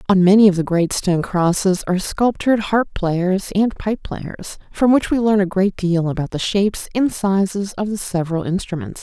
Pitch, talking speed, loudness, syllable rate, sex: 190 Hz, 200 wpm, -18 LUFS, 5.0 syllables/s, female